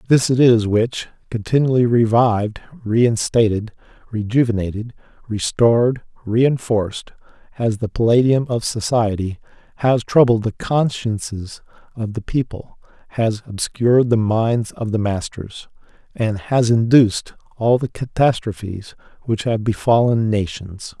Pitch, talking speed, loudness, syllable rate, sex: 115 Hz, 110 wpm, -18 LUFS, 4.4 syllables/s, male